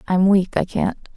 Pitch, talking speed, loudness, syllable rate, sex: 190 Hz, 205 wpm, -19 LUFS, 4.0 syllables/s, female